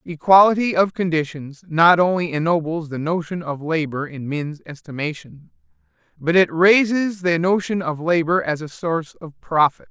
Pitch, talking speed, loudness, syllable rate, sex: 165 Hz, 150 wpm, -19 LUFS, 4.7 syllables/s, male